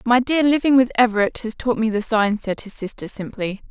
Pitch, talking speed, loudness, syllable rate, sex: 230 Hz, 225 wpm, -20 LUFS, 5.5 syllables/s, female